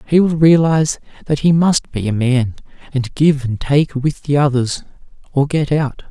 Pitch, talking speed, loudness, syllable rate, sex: 140 Hz, 185 wpm, -16 LUFS, 4.6 syllables/s, male